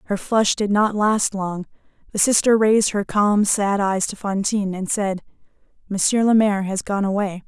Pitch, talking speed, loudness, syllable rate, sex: 200 Hz, 185 wpm, -19 LUFS, 4.9 syllables/s, female